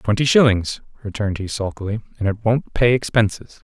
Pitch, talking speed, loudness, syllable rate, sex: 110 Hz, 160 wpm, -19 LUFS, 5.6 syllables/s, male